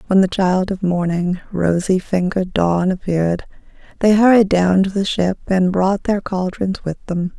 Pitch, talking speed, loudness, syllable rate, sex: 185 Hz, 170 wpm, -17 LUFS, 4.6 syllables/s, female